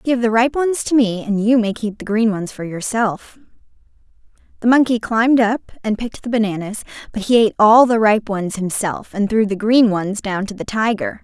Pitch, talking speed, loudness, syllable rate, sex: 220 Hz, 215 wpm, -17 LUFS, 5.2 syllables/s, female